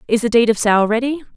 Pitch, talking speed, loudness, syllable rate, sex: 235 Hz, 265 wpm, -16 LUFS, 6.4 syllables/s, female